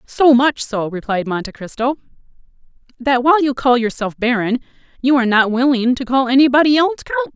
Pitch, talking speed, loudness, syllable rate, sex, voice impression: 255 Hz, 170 wpm, -16 LUFS, 5.7 syllables/s, female, feminine, adult-like, powerful, slightly unique, slightly intense